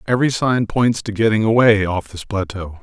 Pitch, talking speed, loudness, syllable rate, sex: 110 Hz, 190 wpm, -17 LUFS, 5.3 syllables/s, male